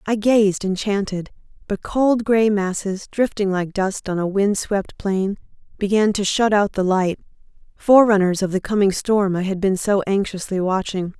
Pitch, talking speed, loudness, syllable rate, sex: 200 Hz, 170 wpm, -19 LUFS, 4.5 syllables/s, female